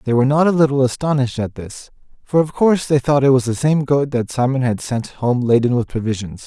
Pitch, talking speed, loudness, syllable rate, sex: 130 Hz, 240 wpm, -17 LUFS, 6.0 syllables/s, male